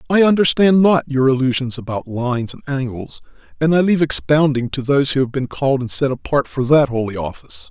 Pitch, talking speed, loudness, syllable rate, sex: 130 Hz, 200 wpm, -17 LUFS, 5.9 syllables/s, male